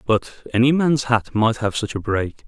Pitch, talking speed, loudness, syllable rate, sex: 120 Hz, 220 wpm, -20 LUFS, 4.4 syllables/s, male